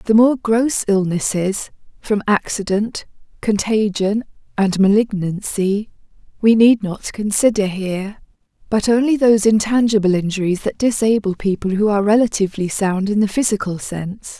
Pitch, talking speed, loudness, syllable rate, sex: 210 Hz, 125 wpm, -17 LUFS, 4.9 syllables/s, female